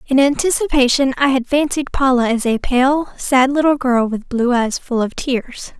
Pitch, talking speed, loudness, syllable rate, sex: 260 Hz, 185 wpm, -16 LUFS, 4.5 syllables/s, female